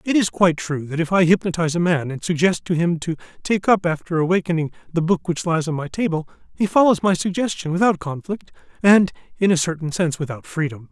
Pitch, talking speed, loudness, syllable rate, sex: 170 Hz, 215 wpm, -20 LUFS, 6.1 syllables/s, male